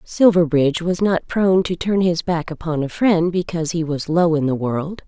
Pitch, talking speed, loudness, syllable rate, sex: 170 Hz, 215 wpm, -19 LUFS, 5.1 syllables/s, female